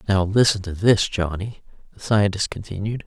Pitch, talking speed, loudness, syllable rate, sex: 100 Hz, 155 wpm, -21 LUFS, 5.0 syllables/s, female